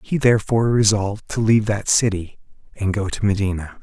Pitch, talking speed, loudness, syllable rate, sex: 105 Hz, 170 wpm, -19 LUFS, 5.9 syllables/s, male